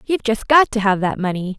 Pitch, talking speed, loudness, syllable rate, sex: 215 Hz, 265 wpm, -17 LUFS, 6.4 syllables/s, female